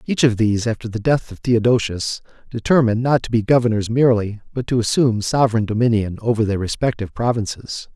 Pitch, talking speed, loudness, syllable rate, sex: 115 Hz, 175 wpm, -19 LUFS, 6.2 syllables/s, male